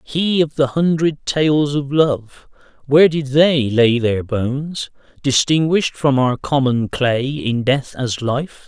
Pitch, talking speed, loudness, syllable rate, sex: 140 Hz, 145 wpm, -17 LUFS, 3.7 syllables/s, male